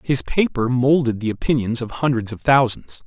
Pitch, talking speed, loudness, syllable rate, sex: 125 Hz, 175 wpm, -19 LUFS, 5.1 syllables/s, male